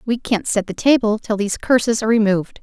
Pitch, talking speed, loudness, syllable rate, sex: 220 Hz, 230 wpm, -18 LUFS, 6.4 syllables/s, female